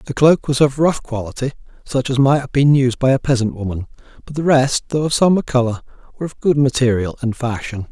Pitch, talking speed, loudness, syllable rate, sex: 130 Hz, 220 wpm, -17 LUFS, 6.0 syllables/s, male